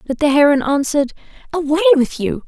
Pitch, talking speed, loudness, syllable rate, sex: 295 Hz, 170 wpm, -16 LUFS, 6.4 syllables/s, female